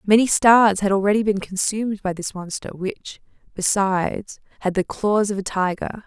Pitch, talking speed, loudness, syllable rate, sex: 200 Hz, 170 wpm, -20 LUFS, 5.3 syllables/s, female